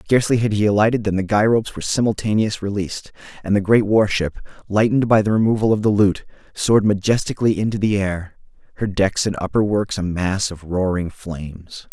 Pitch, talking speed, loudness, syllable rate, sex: 100 Hz, 185 wpm, -19 LUFS, 6.0 syllables/s, male